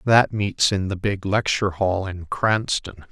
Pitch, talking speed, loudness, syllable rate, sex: 100 Hz, 175 wpm, -22 LUFS, 4.1 syllables/s, male